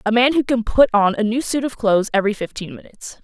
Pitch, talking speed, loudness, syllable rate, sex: 225 Hz, 260 wpm, -18 LUFS, 6.7 syllables/s, female